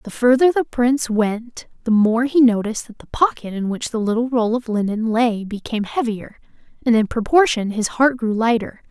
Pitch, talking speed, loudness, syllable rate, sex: 230 Hz, 195 wpm, -19 LUFS, 5.2 syllables/s, female